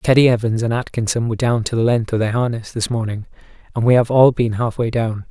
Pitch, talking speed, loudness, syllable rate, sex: 115 Hz, 240 wpm, -18 LUFS, 6.1 syllables/s, male